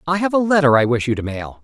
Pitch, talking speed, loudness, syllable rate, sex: 150 Hz, 330 wpm, -17 LUFS, 6.9 syllables/s, male